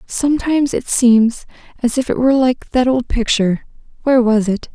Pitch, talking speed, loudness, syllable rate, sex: 245 Hz, 165 wpm, -15 LUFS, 5.4 syllables/s, female